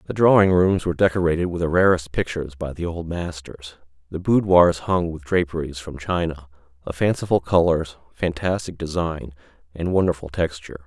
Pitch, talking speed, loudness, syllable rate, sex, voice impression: 85 Hz, 155 wpm, -21 LUFS, 5.4 syllables/s, male, very masculine, very middle-aged, very thick, tensed, very powerful, dark, slightly soft, muffled, slightly fluent, very cool, intellectual, slightly refreshing, sincere, very calm, very mature, friendly, very reassuring, very unique, elegant, slightly wild, sweet, slightly lively, very kind, modest